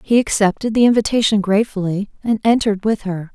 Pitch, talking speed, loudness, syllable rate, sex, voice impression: 210 Hz, 160 wpm, -17 LUFS, 6.1 syllables/s, female, feminine, adult-like, tensed, slightly powerful, clear, fluent, intellectual, calm, friendly, elegant, lively, slightly sharp